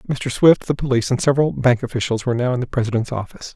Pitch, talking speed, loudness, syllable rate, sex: 125 Hz, 235 wpm, -19 LUFS, 7.5 syllables/s, male